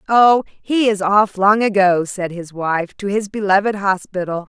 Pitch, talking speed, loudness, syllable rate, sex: 200 Hz, 170 wpm, -17 LUFS, 4.2 syllables/s, female